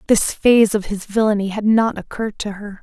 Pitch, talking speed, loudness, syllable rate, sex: 210 Hz, 215 wpm, -18 LUFS, 5.7 syllables/s, female